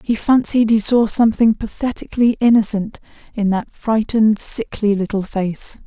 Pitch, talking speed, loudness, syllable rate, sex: 220 Hz, 135 wpm, -17 LUFS, 4.8 syllables/s, female